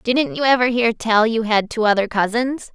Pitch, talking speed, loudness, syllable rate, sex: 230 Hz, 220 wpm, -18 LUFS, 4.8 syllables/s, female